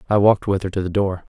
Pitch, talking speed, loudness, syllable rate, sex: 95 Hz, 315 wpm, -20 LUFS, 7.4 syllables/s, male